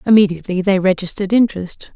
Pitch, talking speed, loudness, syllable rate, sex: 190 Hz, 125 wpm, -16 LUFS, 7.2 syllables/s, female